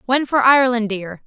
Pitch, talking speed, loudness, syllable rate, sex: 240 Hz, 140 wpm, -16 LUFS, 5.5 syllables/s, female